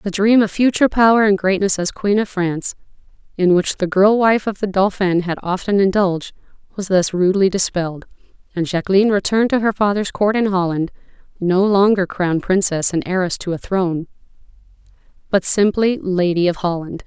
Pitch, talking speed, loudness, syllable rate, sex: 190 Hz, 170 wpm, -17 LUFS, 5.6 syllables/s, female